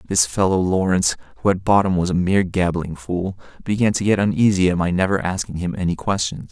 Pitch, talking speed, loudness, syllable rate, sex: 90 Hz, 205 wpm, -19 LUFS, 6.1 syllables/s, male